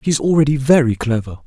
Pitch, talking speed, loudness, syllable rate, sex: 135 Hz, 205 wpm, -16 LUFS, 7.0 syllables/s, male